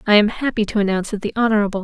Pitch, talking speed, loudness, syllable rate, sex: 210 Hz, 260 wpm, -19 LUFS, 8.2 syllables/s, female